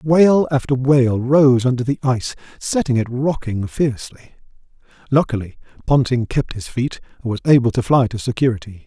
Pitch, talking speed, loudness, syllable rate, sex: 130 Hz, 155 wpm, -18 LUFS, 5.4 syllables/s, male